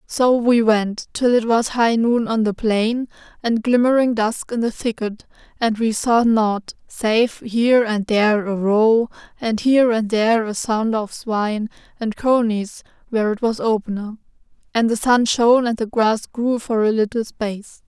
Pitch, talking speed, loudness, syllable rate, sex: 225 Hz, 180 wpm, -19 LUFS, 4.5 syllables/s, female